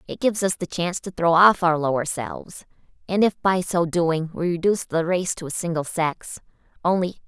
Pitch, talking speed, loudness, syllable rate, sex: 175 Hz, 205 wpm, -22 LUFS, 5.4 syllables/s, female